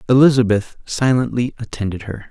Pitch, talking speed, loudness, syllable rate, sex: 115 Hz, 105 wpm, -18 LUFS, 5.5 syllables/s, male